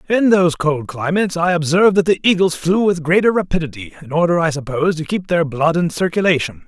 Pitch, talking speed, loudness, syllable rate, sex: 170 Hz, 205 wpm, -16 LUFS, 6.1 syllables/s, male